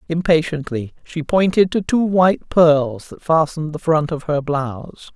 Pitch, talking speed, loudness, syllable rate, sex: 160 Hz, 165 wpm, -18 LUFS, 4.8 syllables/s, male